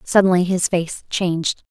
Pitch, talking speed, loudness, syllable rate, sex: 180 Hz, 140 wpm, -19 LUFS, 4.7 syllables/s, female